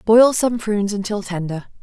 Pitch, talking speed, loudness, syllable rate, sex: 210 Hz, 165 wpm, -19 LUFS, 4.9 syllables/s, female